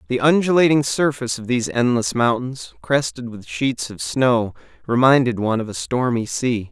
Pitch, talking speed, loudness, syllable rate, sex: 125 Hz, 160 wpm, -19 LUFS, 5.1 syllables/s, male